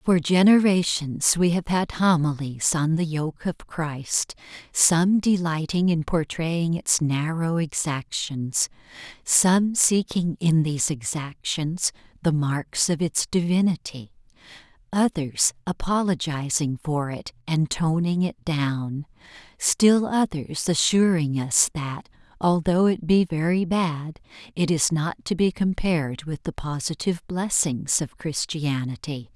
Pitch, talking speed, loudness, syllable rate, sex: 165 Hz, 115 wpm, -23 LUFS, 3.8 syllables/s, female